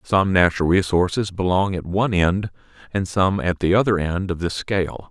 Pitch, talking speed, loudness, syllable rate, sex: 90 Hz, 190 wpm, -20 LUFS, 5.2 syllables/s, male